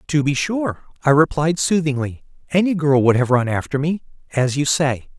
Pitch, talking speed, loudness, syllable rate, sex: 150 Hz, 185 wpm, -19 LUFS, 5.1 syllables/s, male